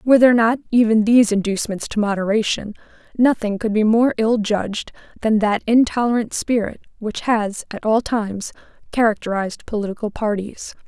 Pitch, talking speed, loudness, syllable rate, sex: 220 Hz, 145 wpm, -19 LUFS, 5.6 syllables/s, female